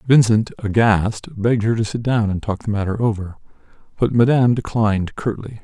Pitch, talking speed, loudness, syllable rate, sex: 110 Hz, 170 wpm, -19 LUFS, 5.4 syllables/s, male